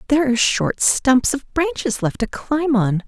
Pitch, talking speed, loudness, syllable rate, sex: 250 Hz, 195 wpm, -18 LUFS, 4.6 syllables/s, female